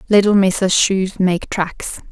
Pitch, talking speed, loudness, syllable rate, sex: 190 Hz, 140 wpm, -16 LUFS, 3.8 syllables/s, female